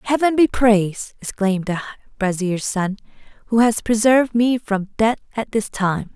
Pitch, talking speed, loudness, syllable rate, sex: 215 Hz, 155 wpm, -19 LUFS, 4.8 syllables/s, female